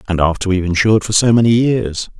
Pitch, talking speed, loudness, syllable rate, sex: 100 Hz, 220 wpm, -14 LUFS, 6.7 syllables/s, male